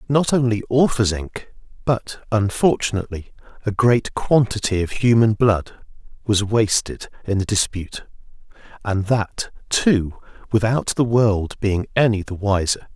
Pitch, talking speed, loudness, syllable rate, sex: 110 Hz, 125 wpm, -20 LUFS, 4.3 syllables/s, male